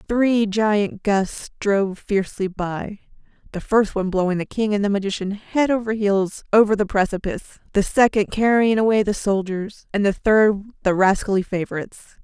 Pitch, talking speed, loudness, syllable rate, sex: 205 Hz, 160 wpm, -20 LUFS, 5.1 syllables/s, female